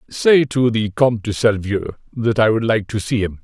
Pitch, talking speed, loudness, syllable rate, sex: 115 Hz, 225 wpm, -17 LUFS, 5.0 syllables/s, male